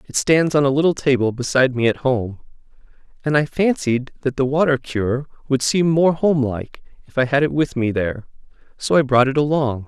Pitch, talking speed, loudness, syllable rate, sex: 135 Hz, 205 wpm, -19 LUFS, 5.3 syllables/s, male